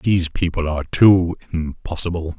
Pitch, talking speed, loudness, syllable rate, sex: 85 Hz, 125 wpm, -19 LUFS, 5.0 syllables/s, male